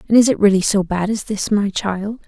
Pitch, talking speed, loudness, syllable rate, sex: 205 Hz, 265 wpm, -17 LUFS, 5.3 syllables/s, female